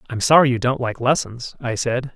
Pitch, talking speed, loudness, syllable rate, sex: 125 Hz, 225 wpm, -19 LUFS, 5.2 syllables/s, male